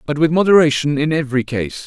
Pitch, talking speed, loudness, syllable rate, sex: 145 Hz, 195 wpm, -16 LUFS, 6.4 syllables/s, male